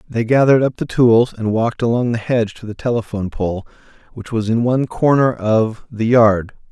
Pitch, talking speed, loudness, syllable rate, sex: 115 Hz, 195 wpm, -17 LUFS, 5.4 syllables/s, male